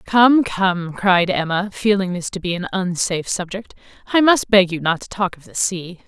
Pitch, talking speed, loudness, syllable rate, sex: 190 Hz, 205 wpm, -18 LUFS, 4.8 syllables/s, female